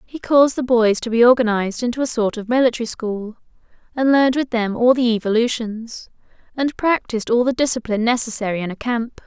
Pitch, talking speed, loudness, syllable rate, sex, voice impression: 235 Hz, 190 wpm, -18 LUFS, 6.1 syllables/s, female, feminine, slightly young, slightly cute, friendly